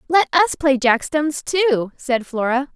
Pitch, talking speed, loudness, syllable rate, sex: 280 Hz, 175 wpm, -18 LUFS, 4.0 syllables/s, female